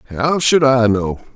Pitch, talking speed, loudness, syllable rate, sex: 125 Hz, 180 wpm, -15 LUFS, 3.9 syllables/s, male